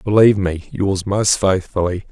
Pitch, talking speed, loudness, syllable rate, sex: 95 Hz, 140 wpm, -17 LUFS, 4.5 syllables/s, male